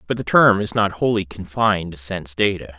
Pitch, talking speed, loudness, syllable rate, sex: 95 Hz, 215 wpm, -19 LUFS, 5.7 syllables/s, male